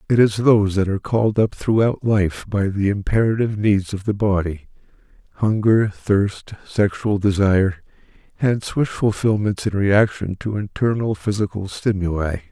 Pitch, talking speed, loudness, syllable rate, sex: 100 Hz, 130 wpm, -19 LUFS, 4.8 syllables/s, male